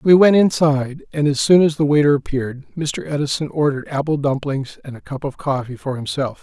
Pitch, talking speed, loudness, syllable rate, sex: 145 Hz, 205 wpm, -18 LUFS, 5.7 syllables/s, male